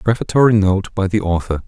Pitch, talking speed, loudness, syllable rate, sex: 100 Hz, 180 wpm, -16 LUFS, 5.8 syllables/s, male